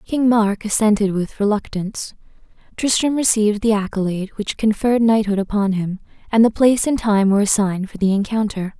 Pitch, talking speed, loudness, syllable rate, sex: 210 Hz, 165 wpm, -18 LUFS, 5.9 syllables/s, female